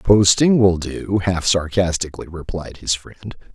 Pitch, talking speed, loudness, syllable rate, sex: 95 Hz, 135 wpm, -18 LUFS, 4.4 syllables/s, male